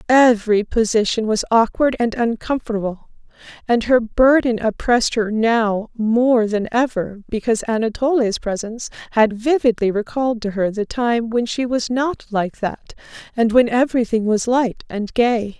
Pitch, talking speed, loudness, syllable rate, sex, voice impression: 230 Hz, 145 wpm, -18 LUFS, 4.7 syllables/s, female, feminine, adult-like, soft, intellectual, elegant, sweet, kind